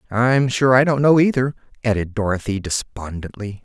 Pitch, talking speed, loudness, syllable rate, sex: 120 Hz, 150 wpm, -18 LUFS, 5.1 syllables/s, male